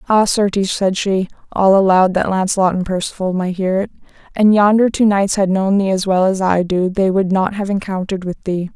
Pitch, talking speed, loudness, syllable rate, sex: 190 Hz, 220 wpm, -16 LUFS, 5.5 syllables/s, female